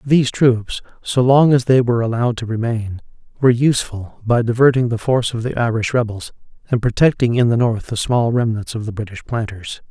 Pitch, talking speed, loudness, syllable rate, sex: 115 Hz, 195 wpm, -17 LUFS, 5.7 syllables/s, male